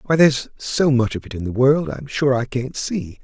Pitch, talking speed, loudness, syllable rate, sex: 130 Hz, 260 wpm, -20 LUFS, 5.1 syllables/s, male